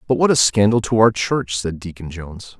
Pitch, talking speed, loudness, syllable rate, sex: 100 Hz, 230 wpm, -17 LUFS, 5.4 syllables/s, male